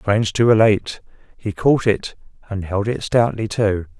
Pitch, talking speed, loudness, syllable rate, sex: 105 Hz, 165 wpm, -18 LUFS, 4.7 syllables/s, male